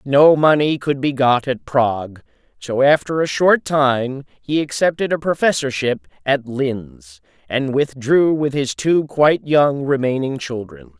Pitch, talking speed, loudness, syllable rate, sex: 140 Hz, 145 wpm, -17 LUFS, 4.0 syllables/s, male